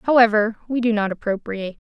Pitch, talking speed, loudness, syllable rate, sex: 220 Hz, 160 wpm, -20 LUFS, 6.1 syllables/s, female